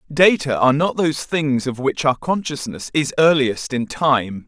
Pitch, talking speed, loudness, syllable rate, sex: 140 Hz, 175 wpm, -18 LUFS, 4.5 syllables/s, male